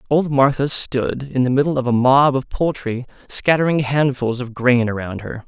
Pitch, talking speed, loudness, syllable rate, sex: 130 Hz, 185 wpm, -18 LUFS, 4.8 syllables/s, male